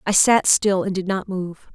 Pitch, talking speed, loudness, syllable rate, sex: 190 Hz, 240 wpm, -19 LUFS, 4.4 syllables/s, female